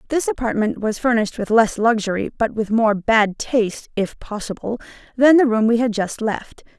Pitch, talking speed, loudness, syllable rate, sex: 225 Hz, 185 wpm, -19 LUFS, 4.9 syllables/s, female